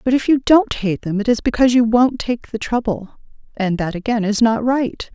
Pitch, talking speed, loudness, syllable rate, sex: 230 Hz, 235 wpm, -17 LUFS, 5.2 syllables/s, female